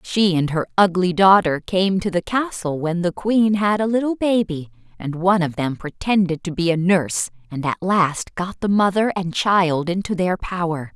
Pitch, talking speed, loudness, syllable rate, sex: 180 Hz, 195 wpm, -19 LUFS, 4.7 syllables/s, female